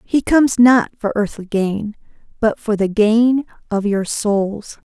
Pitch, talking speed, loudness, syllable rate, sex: 215 Hz, 160 wpm, -17 LUFS, 3.8 syllables/s, female